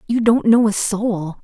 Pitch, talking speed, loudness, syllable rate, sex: 215 Hz, 210 wpm, -16 LUFS, 4.0 syllables/s, female